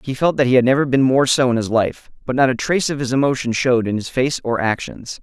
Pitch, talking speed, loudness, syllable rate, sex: 130 Hz, 285 wpm, -18 LUFS, 6.2 syllables/s, male